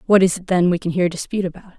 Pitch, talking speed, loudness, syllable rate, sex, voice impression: 180 Hz, 305 wpm, -19 LUFS, 8.7 syllables/s, female, feminine, adult-like, slightly calm, slightly elegant, slightly strict